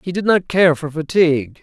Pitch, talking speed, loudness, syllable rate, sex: 160 Hz, 220 wpm, -16 LUFS, 5.2 syllables/s, male